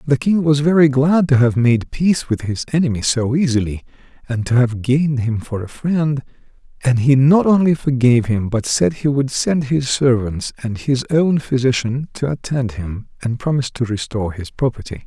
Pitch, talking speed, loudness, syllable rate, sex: 130 Hz, 190 wpm, -17 LUFS, 5.1 syllables/s, male